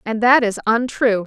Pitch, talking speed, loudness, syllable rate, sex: 225 Hz, 190 wpm, -17 LUFS, 4.6 syllables/s, female